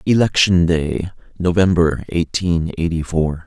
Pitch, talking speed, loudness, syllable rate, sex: 85 Hz, 105 wpm, -17 LUFS, 4.1 syllables/s, male